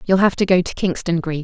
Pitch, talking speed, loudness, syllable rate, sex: 180 Hz, 295 wpm, -18 LUFS, 5.9 syllables/s, female